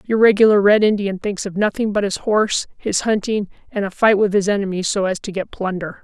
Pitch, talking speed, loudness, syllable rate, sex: 200 Hz, 230 wpm, -18 LUFS, 5.7 syllables/s, female